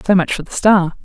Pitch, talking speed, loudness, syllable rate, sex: 185 Hz, 290 wpm, -15 LUFS, 5.9 syllables/s, female